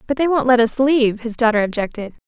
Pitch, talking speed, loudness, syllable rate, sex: 240 Hz, 240 wpm, -17 LUFS, 6.5 syllables/s, female